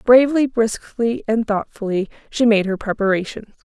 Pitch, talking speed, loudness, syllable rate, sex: 225 Hz, 130 wpm, -19 LUFS, 4.9 syllables/s, female